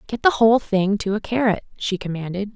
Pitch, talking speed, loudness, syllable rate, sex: 205 Hz, 210 wpm, -20 LUFS, 5.8 syllables/s, female